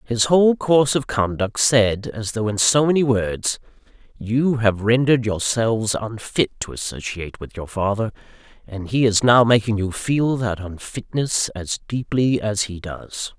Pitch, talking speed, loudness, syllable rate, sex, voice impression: 115 Hz, 155 wpm, -20 LUFS, 4.4 syllables/s, male, masculine, adult-like, slightly middle-aged, thick, very tensed, very powerful, very bright, soft, very clear, fluent, cool, intellectual, very refreshing, sincere, calm, slightly mature, friendly, reassuring, unique, wild, slightly sweet, very lively, very kind, slightly intense